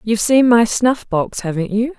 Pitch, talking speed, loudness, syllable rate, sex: 220 Hz, 210 wpm, -16 LUFS, 4.8 syllables/s, female